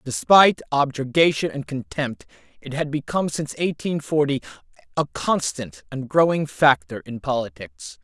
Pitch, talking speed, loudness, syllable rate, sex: 145 Hz, 125 wpm, -21 LUFS, 4.8 syllables/s, male